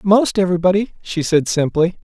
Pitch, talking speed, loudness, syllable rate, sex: 180 Hz, 140 wpm, -17 LUFS, 5.4 syllables/s, male